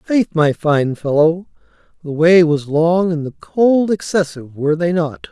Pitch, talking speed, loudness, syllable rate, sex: 165 Hz, 170 wpm, -16 LUFS, 4.3 syllables/s, male